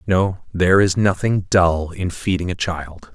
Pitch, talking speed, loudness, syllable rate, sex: 90 Hz, 170 wpm, -19 LUFS, 4.1 syllables/s, male